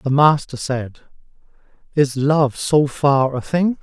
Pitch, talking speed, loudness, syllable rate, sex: 140 Hz, 140 wpm, -18 LUFS, 3.5 syllables/s, male